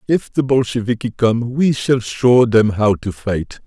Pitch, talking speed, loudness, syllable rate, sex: 120 Hz, 180 wpm, -16 LUFS, 4.1 syllables/s, male